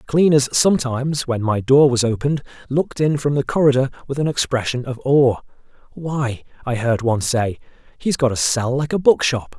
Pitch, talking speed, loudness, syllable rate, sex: 135 Hz, 180 wpm, -18 LUFS, 5.4 syllables/s, male